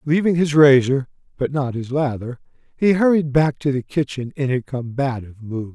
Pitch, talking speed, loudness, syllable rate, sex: 135 Hz, 180 wpm, -19 LUFS, 5.1 syllables/s, male